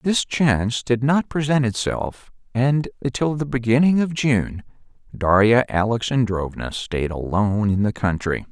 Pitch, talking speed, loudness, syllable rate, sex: 120 Hz, 135 wpm, -20 LUFS, 4.3 syllables/s, male